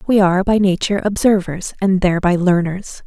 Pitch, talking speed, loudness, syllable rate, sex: 190 Hz, 155 wpm, -16 LUFS, 5.7 syllables/s, female